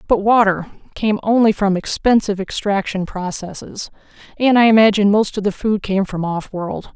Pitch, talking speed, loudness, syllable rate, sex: 205 Hz, 155 wpm, -17 LUFS, 5.2 syllables/s, female